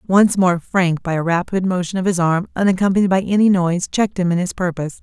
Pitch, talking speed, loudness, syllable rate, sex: 185 Hz, 225 wpm, -17 LUFS, 6.1 syllables/s, female